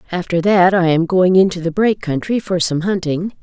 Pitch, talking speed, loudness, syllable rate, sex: 180 Hz, 210 wpm, -16 LUFS, 5.4 syllables/s, female